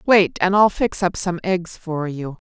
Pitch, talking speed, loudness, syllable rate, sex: 180 Hz, 220 wpm, -20 LUFS, 4.0 syllables/s, female